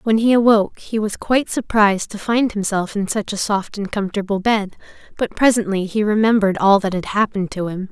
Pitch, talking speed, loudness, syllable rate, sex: 205 Hz, 205 wpm, -18 LUFS, 5.9 syllables/s, female